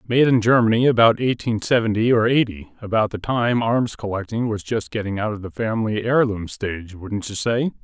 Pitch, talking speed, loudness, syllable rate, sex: 110 Hz, 190 wpm, -20 LUFS, 5.3 syllables/s, male